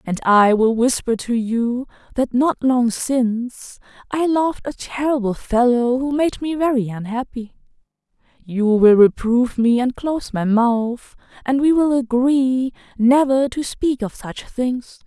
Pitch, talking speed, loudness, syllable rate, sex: 245 Hz, 150 wpm, -18 LUFS, 4.1 syllables/s, female